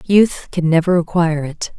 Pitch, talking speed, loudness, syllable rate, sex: 170 Hz, 170 wpm, -16 LUFS, 4.9 syllables/s, female